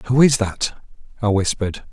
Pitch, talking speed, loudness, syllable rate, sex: 110 Hz, 155 wpm, -19 LUFS, 4.7 syllables/s, male